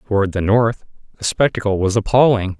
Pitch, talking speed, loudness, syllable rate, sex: 105 Hz, 160 wpm, -17 LUFS, 5.8 syllables/s, male